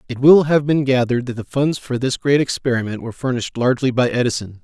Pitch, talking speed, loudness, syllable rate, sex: 125 Hz, 220 wpm, -18 LUFS, 6.5 syllables/s, male